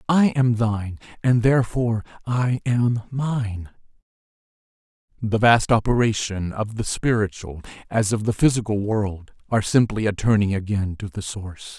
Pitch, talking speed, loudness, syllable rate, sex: 110 Hz, 135 wpm, -22 LUFS, 4.7 syllables/s, male